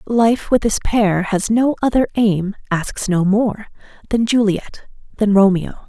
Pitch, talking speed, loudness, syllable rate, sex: 210 Hz, 145 wpm, -17 LUFS, 3.9 syllables/s, female